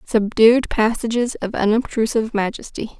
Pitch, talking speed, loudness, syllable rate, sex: 225 Hz, 100 wpm, -18 LUFS, 5.0 syllables/s, female